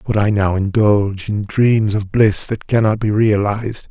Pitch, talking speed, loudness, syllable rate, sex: 105 Hz, 185 wpm, -16 LUFS, 4.5 syllables/s, male